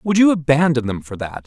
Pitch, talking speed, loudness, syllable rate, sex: 145 Hz, 245 wpm, -18 LUFS, 5.6 syllables/s, male